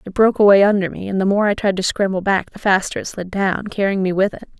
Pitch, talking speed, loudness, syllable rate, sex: 195 Hz, 290 wpm, -17 LUFS, 6.3 syllables/s, female